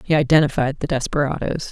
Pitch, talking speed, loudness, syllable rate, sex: 145 Hz, 140 wpm, -19 LUFS, 6.2 syllables/s, female